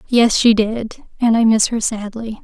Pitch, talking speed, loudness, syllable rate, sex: 220 Hz, 195 wpm, -16 LUFS, 4.4 syllables/s, female